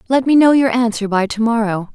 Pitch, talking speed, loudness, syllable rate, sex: 230 Hz, 245 wpm, -15 LUFS, 5.8 syllables/s, female